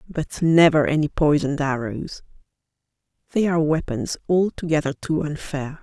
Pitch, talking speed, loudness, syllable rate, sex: 155 Hz, 105 wpm, -21 LUFS, 5.0 syllables/s, female